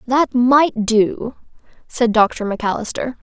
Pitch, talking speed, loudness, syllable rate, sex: 235 Hz, 110 wpm, -17 LUFS, 4.0 syllables/s, female